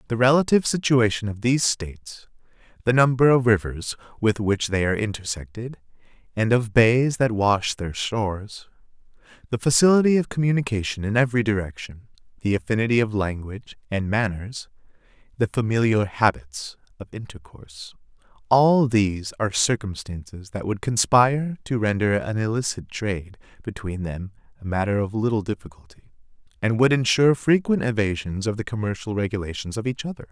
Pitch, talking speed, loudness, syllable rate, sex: 110 Hz, 140 wpm, -22 LUFS, 5.5 syllables/s, male